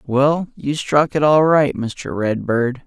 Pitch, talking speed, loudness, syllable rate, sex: 140 Hz, 170 wpm, -17 LUFS, 3.4 syllables/s, male